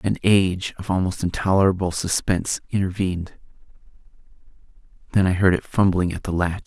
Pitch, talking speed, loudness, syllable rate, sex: 95 Hz, 135 wpm, -21 LUFS, 5.8 syllables/s, male